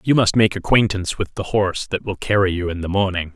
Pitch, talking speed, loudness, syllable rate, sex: 95 Hz, 250 wpm, -19 LUFS, 6.2 syllables/s, male